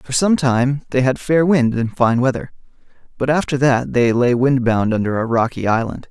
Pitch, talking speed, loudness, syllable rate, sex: 125 Hz, 205 wpm, -17 LUFS, 4.9 syllables/s, male